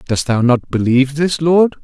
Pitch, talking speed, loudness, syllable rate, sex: 140 Hz, 195 wpm, -14 LUFS, 5.3 syllables/s, male